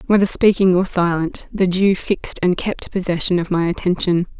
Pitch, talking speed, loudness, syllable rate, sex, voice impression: 185 Hz, 175 wpm, -18 LUFS, 5.1 syllables/s, female, feminine, adult-like, slightly fluent, slightly intellectual, slightly calm, slightly elegant